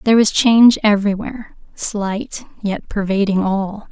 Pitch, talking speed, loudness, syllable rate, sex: 210 Hz, 125 wpm, -16 LUFS, 4.7 syllables/s, female